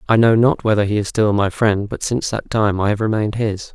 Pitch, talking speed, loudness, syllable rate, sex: 110 Hz, 270 wpm, -18 LUFS, 5.9 syllables/s, male